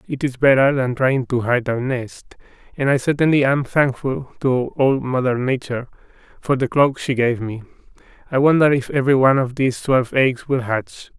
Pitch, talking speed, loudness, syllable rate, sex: 130 Hz, 190 wpm, -18 LUFS, 5.1 syllables/s, male